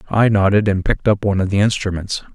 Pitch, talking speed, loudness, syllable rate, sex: 100 Hz, 230 wpm, -17 LUFS, 6.8 syllables/s, male